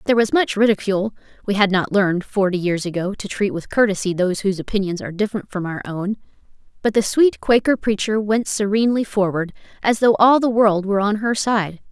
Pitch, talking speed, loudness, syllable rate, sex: 205 Hz, 190 wpm, -19 LUFS, 6.1 syllables/s, female